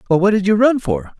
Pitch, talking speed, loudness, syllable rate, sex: 180 Hz, 300 wpm, -15 LUFS, 6.3 syllables/s, male